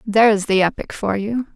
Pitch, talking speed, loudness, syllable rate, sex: 210 Hz, 195 wpm, -18 LUFS, 5.0 syllables/s, female